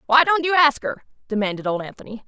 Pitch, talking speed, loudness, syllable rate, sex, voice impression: 255 Hz, 210 wpm, -20 LUFS, 6.7 syllables/s, female, feminine, adult-like, tensed, very powerful, slightly hard, very fluent, slightly friendly, slightly wild, lively, strict, intense, sharp